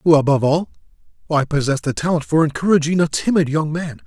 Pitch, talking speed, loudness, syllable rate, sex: 150 Hz, 175 wpm, -18 LUFS, 6.0 syllables/s, male